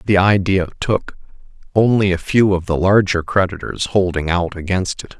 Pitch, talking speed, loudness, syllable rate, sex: 95 Hz, 160 wpm, -17 LUFS, 4.7 syllables/s, male